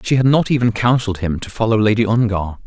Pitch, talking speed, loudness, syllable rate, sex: 110 Hz, 225 wpm, -17 LUFS, 6.4 syllables/s, male